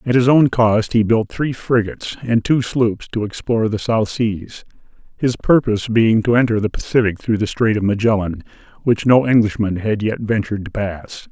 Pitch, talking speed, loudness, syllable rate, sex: 110 Hz, 190 wpm, -17 LUFS, 5.0 syllables/s, male